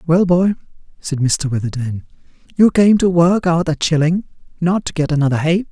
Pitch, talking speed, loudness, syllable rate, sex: 165 Hz, 170 wpm, -16 LUFS, 5.1 syllables/s, male